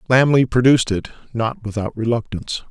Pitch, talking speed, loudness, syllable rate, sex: 115 Hz, 135 wpm, -18 LUFS, 5.9 syllables/s, male